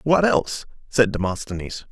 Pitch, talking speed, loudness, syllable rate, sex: 125 Hz, 125 wpm, -22 LUFS, 5.1 syllables/s, male